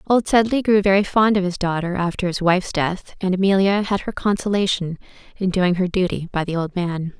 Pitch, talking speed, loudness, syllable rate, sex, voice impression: 185 Hz, 210 wpm, -20 LUFS, 5.5 syllables/s, female, feminine, adult-like, tensed, slightly dark, clear, slightly fluent, slightly halting, intellectual, calm, slightly strict, sharp